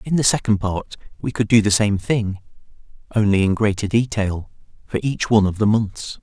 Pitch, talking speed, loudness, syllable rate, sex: 105 Hz, 195 wpm, -19 LUFS, 5.3 syllables/s, male